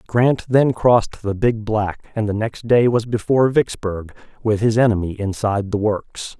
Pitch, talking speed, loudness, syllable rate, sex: 110 Hz, 180 wpm, -19 LUFS, 4.7 syllables/s, male